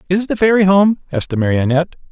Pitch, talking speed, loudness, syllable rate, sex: 175 Hz, 200 wpm, -15 LUFS, 7.1 syllables/s, male